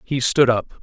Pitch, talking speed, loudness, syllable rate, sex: 125 Hz, 215 wpm, -18 LUFS, 4.2 syllables/s, male